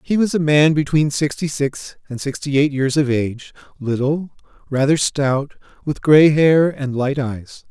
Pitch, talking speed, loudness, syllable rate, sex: 145 Hz, 170 wpm, -18 LUFS, 4.2 syllables/s, male